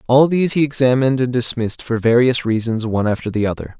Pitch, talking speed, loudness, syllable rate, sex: 125 Hz, 205 wpm, -17 LUFS, 6.6 syllables/s, male